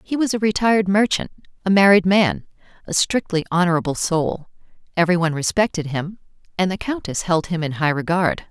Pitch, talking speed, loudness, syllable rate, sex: 180 Hz, 160 wpm, -19 LUFS, 5.6 syllables/s, female